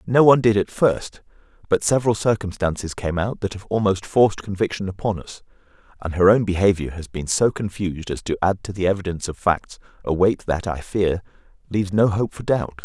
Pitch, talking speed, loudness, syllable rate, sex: 95 Hz, 200 wpm, -21 LUFS, 5.7 syllables/s, male